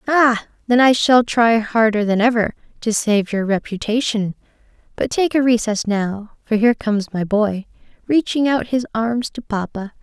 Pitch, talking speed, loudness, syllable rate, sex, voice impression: 225 Hz, 170 wpm, -18 LUFS, 4.6 syllables/s, female, very feminine, slightly adult-like, slightly soft, slightly cute, slightly calm, slightly sweet, kind